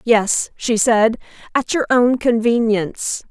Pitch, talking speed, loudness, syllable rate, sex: 230 Hz, 125 wpm, -17 LUFS, 3.7 syllables/s, female